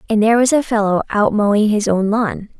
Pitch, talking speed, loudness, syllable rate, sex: 215 Hz, 230 wpm, -15 LUFS, 5.7 syllables/s, female